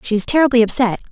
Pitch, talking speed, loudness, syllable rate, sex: 235 Hz, 215 wpm, -15 LUFS, 7.6 syllables/s, female